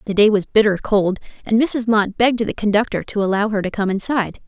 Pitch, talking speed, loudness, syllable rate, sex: 210 Hz, 230 wpm, -18 LUFS, 6.0 syllables/s, female